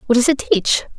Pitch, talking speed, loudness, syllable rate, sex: 265 Hz, 245 wpm, -16 LUFS, 5.7 syllables/s, female